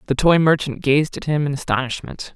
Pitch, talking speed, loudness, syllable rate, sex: 145 Hz, 205 wpm, -19 LUFS, 5.5 syllables/s, female